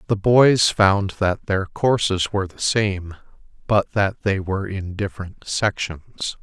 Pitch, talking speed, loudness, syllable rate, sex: 100 Hz, 150 wpm, -20 LUFS, 3.9 syllables/s, male